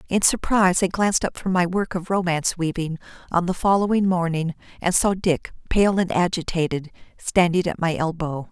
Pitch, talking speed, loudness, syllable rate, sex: 175 Hz, 175 wpm, -22 LUFS, 5.3 syllables/s, female